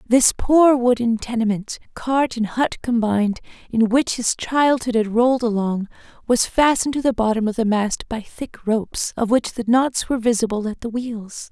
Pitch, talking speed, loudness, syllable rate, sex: 235 Hz, 180 wpm, -20 LUFS, 4.8 syllables/s, female